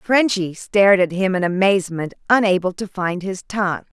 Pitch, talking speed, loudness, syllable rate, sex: 190 Hz, 165 wpm, -19 LUFS, 5.2 syllables/s, female